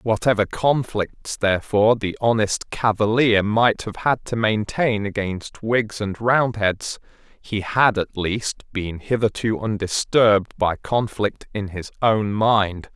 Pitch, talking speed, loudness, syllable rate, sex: 105 Hz, 130 wpm, -21 LUFS, 3.7 syllables/s, male